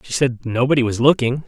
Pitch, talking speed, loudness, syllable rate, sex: 130 Hz, 205 wpm, -18 LUFS, 6.1 syllables/s, male